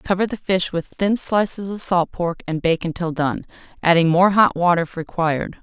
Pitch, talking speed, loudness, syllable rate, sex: 180 Hz, 205 wpm, -19 LUFS, 5.0 syllables/s, female